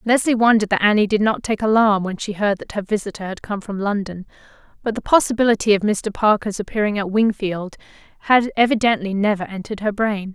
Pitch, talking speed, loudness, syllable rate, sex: 210 Hz, 190 wpm, -19 LUFS, 6.0 syllables/s, female